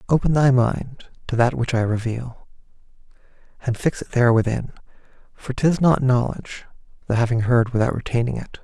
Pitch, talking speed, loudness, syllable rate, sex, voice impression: 125 Hz, 160 wpm, -21 LUFS, 5.4 syllables/s, male, masculine, adult-like, slightly relaxed, weak, very calm, sweet, kind, slightly modest